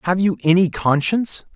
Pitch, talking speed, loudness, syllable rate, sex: 180 Hz, 155 wpm, -18 LUFS, 5.4 syllables/s, male